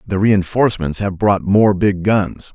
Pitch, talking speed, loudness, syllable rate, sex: 100 Hz, 165 wpm, -16 LUFS, 4.1 syllables/s, male